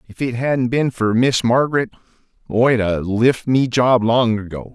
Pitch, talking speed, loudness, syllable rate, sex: 120 Hz, 175 wpm, -17 LUFS, 4.2 syllables/s, male